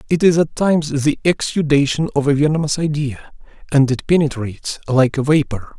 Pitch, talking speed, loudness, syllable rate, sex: 145 Hz, 165 wpm, -17 LUFS, 5.4 syllables/s, male